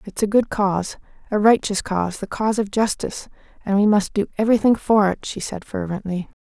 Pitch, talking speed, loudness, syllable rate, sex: 205 Hz, 180 wpm, -20 LUFS, 5.9 syllables/s, female